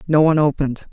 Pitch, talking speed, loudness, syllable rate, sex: 145 Hz, 195 wpm, -17 LUFS, 8.5 syllables/s, female